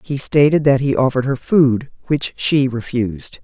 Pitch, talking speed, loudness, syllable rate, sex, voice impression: 135 Hz, 175 wpm, -17 LUFS, 4.8 syllables/s, female, very feminine, very adult-like, slightly middle-aged, calm, elegant